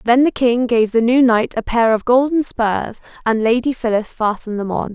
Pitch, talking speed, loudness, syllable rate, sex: 235 Hz, 220 wpm, -16 LUFS, 5.0 syllables/s, female